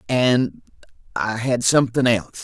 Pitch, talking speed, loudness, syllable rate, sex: 110 Hz, 100 wpm, -19 LUFS, 4.7 syllables/s, male